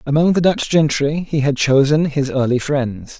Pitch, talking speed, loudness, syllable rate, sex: 145 Hz, 190 wpm, -16 LUFS, 4.6 syllables/s, male